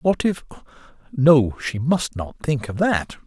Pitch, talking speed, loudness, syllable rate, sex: 135 Hz, 145 wpm, -21 LUFS, 3.8 syllables/s, male